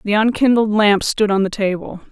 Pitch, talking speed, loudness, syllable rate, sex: 205 Hz, 200 wpm, -16 LUFS, 5.1 syllables/s, female